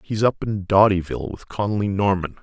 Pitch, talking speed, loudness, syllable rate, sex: 95 Hz, 175 wpm, -21 LUFS, 5.7 syllables/s, male